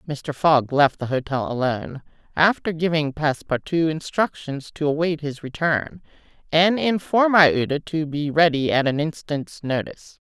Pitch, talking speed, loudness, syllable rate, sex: 150 Hz, 140 wpm, -21 LUFS, 4.7 syllables/s, female